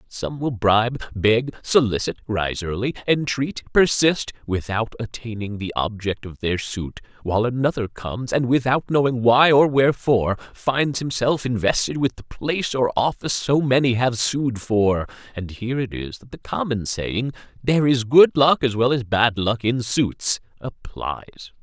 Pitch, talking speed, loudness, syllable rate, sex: 120 Hz, 160 wpm, -21 LUFS, 4.6 syllables/s, male